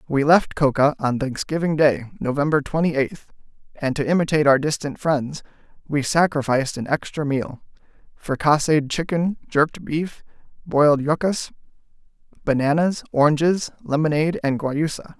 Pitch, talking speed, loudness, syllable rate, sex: 150 Hz, 120 wpm, -21 LUFS, 5.0 syllables/s, male